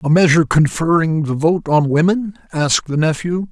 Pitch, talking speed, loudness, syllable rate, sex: 165 Hz, 170 wpm, -16 LUFS, 5.2 syllables/s, male